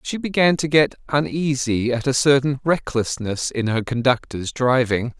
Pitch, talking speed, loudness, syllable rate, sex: 130 Hz, 150 wpm, -20 LUFS, 4.5 syllables/s, male